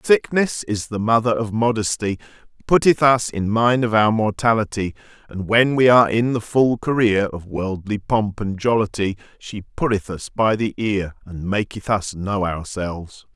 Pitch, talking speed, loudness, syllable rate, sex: 110 Hz, 165 wpm, -19 LUFS, 4.5 syllables/s, male